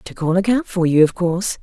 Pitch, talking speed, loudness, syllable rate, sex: 185 Hz, 295 wpm, -17 LUFS, 5.7 syllables/s, female